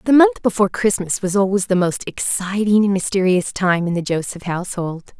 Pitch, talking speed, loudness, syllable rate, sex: 190 Hz, 185 wpm, -18 LUFS, 5.5 syllables/s, female